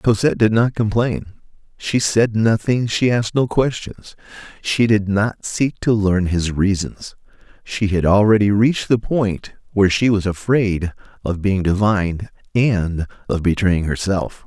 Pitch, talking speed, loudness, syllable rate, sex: 105 Hz, 150 wpm, -18 LUFS, 4.3 syllables/s, male